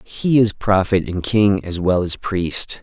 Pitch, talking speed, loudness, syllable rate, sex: 100 Hz, 190 wpm, -18 LUFS, 3.7 syllables/s, male